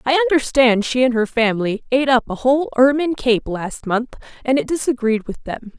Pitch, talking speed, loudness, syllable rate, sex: 250 Hz, 195 wpm, -18 LUFS, 5.6 syllables/s, female